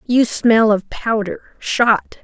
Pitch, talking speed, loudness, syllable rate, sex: 225 Hz, 135 wpm, -16 LUFS, 3.0 syllables/s, female